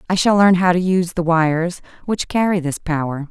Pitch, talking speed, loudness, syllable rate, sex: 175 Hz, 220 wpm, -17 LUFS, 5.5 syllables/s, female